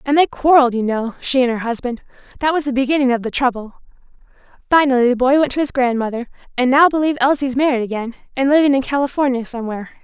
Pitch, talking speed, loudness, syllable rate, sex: 260 Hz, 195 wpm, -17 LUFS, 7.1 syllables/s, female